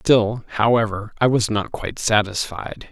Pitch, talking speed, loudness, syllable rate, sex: 110 Hz, 145 wpm, -20 LUFS, 4.5 syllables/s, male